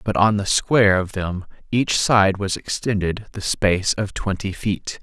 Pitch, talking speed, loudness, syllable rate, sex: 100 Hz, 180 wpm, -20 LUFS, 4.4 syllables/s, male